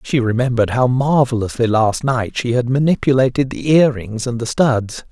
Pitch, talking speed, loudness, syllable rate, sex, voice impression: 125 Hz, 175 wpm, -16 LUFS, 5.0 syllables/s, male, masculine, adult-like, slightly clear, refreshing, slightly friendly, slightly unique, slightly light